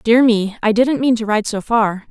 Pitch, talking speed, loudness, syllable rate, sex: 225 Hz, 255 wpm, -16 LUFS, 4.6 syllables/s, female